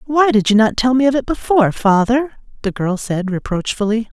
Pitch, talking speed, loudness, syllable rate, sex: 230 Hz, 200 wpm, -16 LUFS, 5.5 syllables/s, female